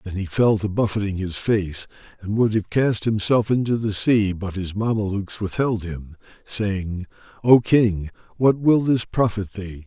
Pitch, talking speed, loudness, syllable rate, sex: 105 Hz, 170 wpm, -21 LUFS, 4.3 syllables/s, male